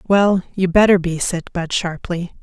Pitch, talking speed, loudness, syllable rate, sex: 180 Hz, 175 wpm, -18 LUFS, 4.2 syllables/s, female